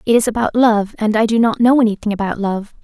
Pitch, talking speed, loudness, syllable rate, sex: 220 Hz, 255 wpm, -15 LUFS, 6.1 syllables/s, female